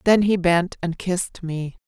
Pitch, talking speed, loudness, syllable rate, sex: 180 Hz, 190 wpm, -22 LUFS, 4.2 syllables/s, female